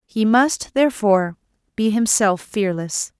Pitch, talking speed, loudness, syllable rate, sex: 215 Hz, 115 wpm, -19 LUFS, 4.2 syllables/s, female